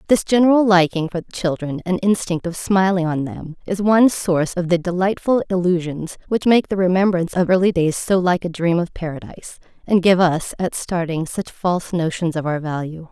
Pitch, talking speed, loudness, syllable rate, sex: 180 Hz, 190 wpm, -19 LUFS, 5.3 syllables/s, female